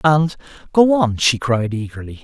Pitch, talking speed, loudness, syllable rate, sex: 135 Hz, 135 wpm, -17 LUFS, 4.6 syllables/s, male